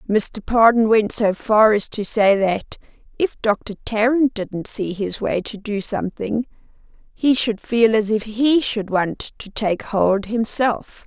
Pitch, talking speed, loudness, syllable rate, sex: 215 Hz, 170 wpm, -19 LUFS, 3.7 syllables/s, female